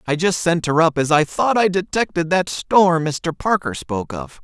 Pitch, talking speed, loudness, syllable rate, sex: 165 Hz, 215 wpm, -18 LUFS, 4.7 syllables/s, male